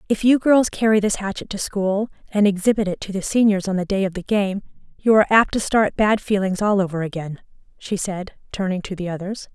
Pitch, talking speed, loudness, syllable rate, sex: 200 Hz, 225 wpm, -20 LUFS, 5.6 syllables/s, female